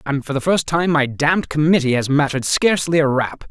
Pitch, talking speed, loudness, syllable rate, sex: 150 Hz, 225 wpm, -17 LUFS, 6.0 syllables/s, male